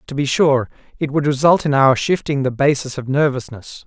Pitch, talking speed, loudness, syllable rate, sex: 140 Hz, 200 wpm, -17 LUFS, 5.2 syllables/s, male